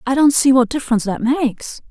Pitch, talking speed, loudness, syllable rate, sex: 255 Hz, 220 wpm, -16 LUFS, 6.4 syllables/s, female